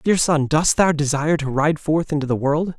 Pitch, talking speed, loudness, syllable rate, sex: 150 Hz, 235 wpm, -19 LUFS, 5.1 syllables/s, male